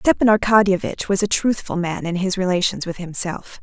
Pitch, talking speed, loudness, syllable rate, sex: 190 Hz, 180 wpm, -19 LUFS, 5.4 syllables/s, female